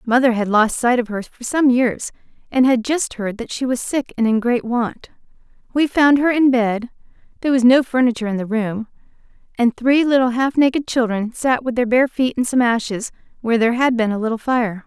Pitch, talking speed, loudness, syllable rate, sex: 245 Hz, 220 wpm, -18 LUFS, 5.4 syllables/s, female